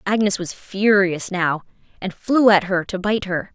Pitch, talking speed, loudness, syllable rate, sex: 195 Hz, 185 wpm, -19 LUFS, 4.2 syllables/s, female